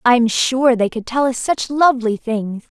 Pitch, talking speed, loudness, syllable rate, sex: 240 Hz, 195 wpm, -17 LUFS, 4.3 syllables/s, female